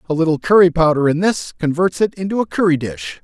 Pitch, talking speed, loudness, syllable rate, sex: 165 Hz, 225 wpm, -16 LUFS, 6.0 syllables/s, male